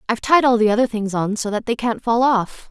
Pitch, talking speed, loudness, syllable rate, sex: 225 Hz, 290 wpm, -18 LUFS, 5.9 syllables/s, female